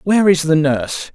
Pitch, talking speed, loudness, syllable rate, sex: 165 Hz, 210 wpm, -15 LUFS, 5.7 syllables/s, male